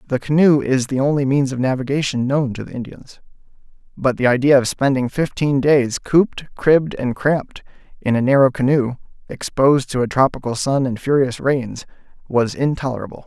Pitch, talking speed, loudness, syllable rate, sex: 135 Hz, 165 wpm, -18 LUFS, 5.3 syllables/s, male